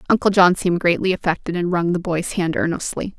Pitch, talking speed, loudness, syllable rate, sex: 175 Hz, 205 wpm, -19 LUFS, 6.0 syllables/s, female